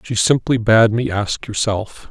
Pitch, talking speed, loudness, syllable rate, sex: 110 Hz, 170 wpm, -17 LUFS, 4.0 syllables/s, male